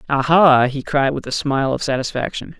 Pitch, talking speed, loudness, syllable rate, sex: 140 Hz, 185 wpm, -17 LUFS, 5.4 syllables/s, male